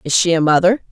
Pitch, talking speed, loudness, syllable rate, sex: 175 Hz, 265 wpm, -14 LUFS, 6.6 syllables/s, female